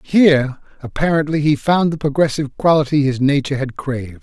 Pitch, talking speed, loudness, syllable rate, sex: 145 Hz, 155 wpm, -17 LUFS, 5.9 syllables/s, male